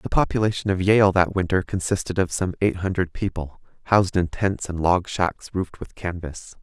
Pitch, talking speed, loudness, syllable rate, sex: 95 Hz, 190 wpm, -23 LUFS, 5.1 syllables/s, male